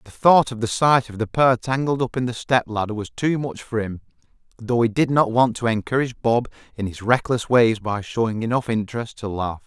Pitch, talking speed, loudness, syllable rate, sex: 120 Hz, 230 wpm, -21 LUFS, 5.5 syllables/s, male